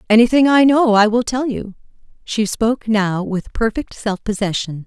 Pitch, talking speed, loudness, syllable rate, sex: 225 Hz, 175 wpm, -17 LUFS, 4.8 syllables/s, female